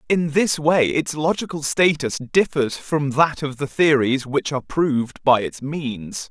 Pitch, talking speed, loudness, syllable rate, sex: 145 Hz, 170 wpm, -20 LUFS, 4.1 syllables/s, male